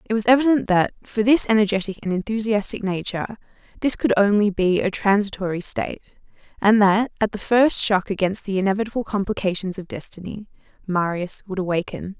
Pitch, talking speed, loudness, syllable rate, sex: 205 Hz, 155 wpm, -21 LUFS, 5.7 syllables/s, female